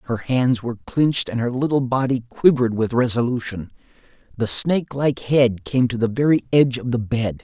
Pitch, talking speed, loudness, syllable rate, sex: 125 Hz, 185 wpm, -20 LUFS, 5.4 syllables/s, male